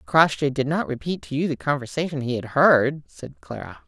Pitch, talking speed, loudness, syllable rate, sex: 145 Hz, 200 wpm, -22 LUFS, 5.2 syllables/s, female